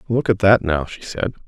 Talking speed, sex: 245 wpm, male